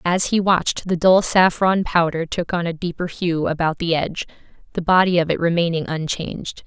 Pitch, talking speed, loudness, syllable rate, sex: 170 Hz, 190 wpm, -19 LUFS, 5.3 syllables/s, female